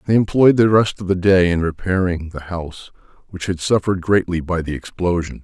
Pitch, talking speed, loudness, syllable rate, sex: 90 Hz, 200 wpm, -18 LUFS, 5.6 syllables/s, male